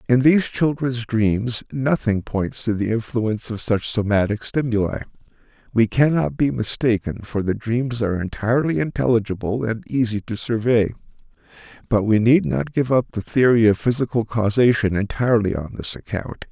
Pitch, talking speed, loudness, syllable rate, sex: 115 Hz, 155 wpm, -20 LUFS, 5.0 syllables/s, male